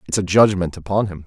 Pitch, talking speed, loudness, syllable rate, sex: 95 Hz, 240 wpm, -18 LUFS, 6.4 syllables/s, male